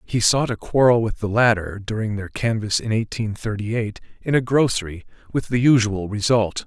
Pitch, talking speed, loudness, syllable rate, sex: 110 Hz, 190 wpm, -21 LUFS, 5.2 syllables/s, male